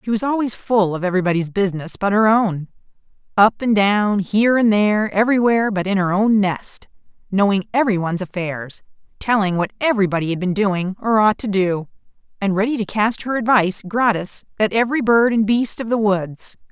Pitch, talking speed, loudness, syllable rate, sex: 205 Hz, 175 wpm, -18 LUFS, 5.6 syllables/s, female